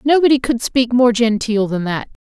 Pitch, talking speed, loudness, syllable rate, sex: 235 Hz, 185 wpm, -16 LUFS, 4.9 syllables/s, female